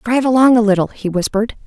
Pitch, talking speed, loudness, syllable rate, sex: 225 Hz, 215 wpm, -15 LUFS, 7.1 syllables/s, female